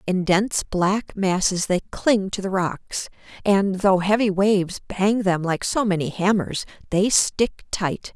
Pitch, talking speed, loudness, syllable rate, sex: 195 Hz, 160 wpm, -22 LUFS, 4.0 syllables/s, female